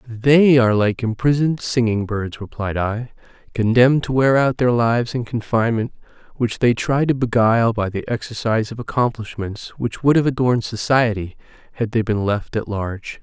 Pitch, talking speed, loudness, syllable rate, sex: 115 Hz, 170 wpm, -19 LUFS, 5.3 syllables/s, male